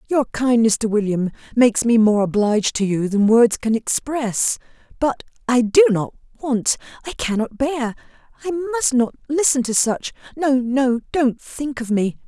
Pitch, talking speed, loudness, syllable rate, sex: 245 Hz, 160 wpm, -19 LUFS, 4.4 syllables/s, female